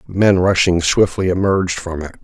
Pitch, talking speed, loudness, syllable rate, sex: 90 Hz, 160 wpm, -16 LUFS, 5.0 syllables/s, male